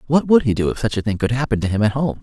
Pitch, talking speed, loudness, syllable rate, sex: 120 Hz, 380 wpm, -18 LUFS, 7.3 syllables/s, male